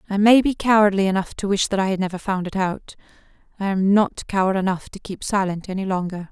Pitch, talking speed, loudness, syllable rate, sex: 195 Hz, 220 wpm, -20 LUFS, 6.1 syllables/s, female